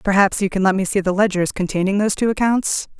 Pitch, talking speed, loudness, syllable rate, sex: 195 Hz, 240 wpm, -18 LUFS, 6.4 syllables/s, female